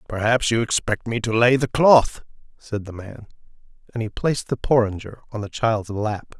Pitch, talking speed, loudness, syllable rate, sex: 115 Hz, 190 wpm, -21 LUFS, 5.0 syllables/s, male